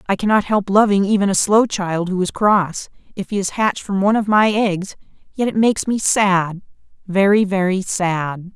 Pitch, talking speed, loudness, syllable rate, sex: 195 Hz, 190 wpm, -17 LUFS, 5.0 syllables/s, female